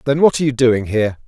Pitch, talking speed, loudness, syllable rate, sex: 125 Hz, 285 wpm, -16 LUFS, 7.3 syllables/s, male